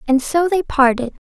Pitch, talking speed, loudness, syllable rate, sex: 290 Hz, 190 wpm, -17 LUFS, 5.1 syllables/s, female